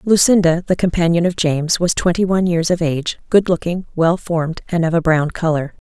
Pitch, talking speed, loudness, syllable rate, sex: 170 Hz, 205 wpm, -17 LUFS, 5.8 syllables/s, female